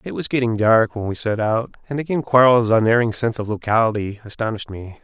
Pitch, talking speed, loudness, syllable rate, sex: 115 Hz, 205 wpm, -19 LUFS, 6.1 syllables/s, male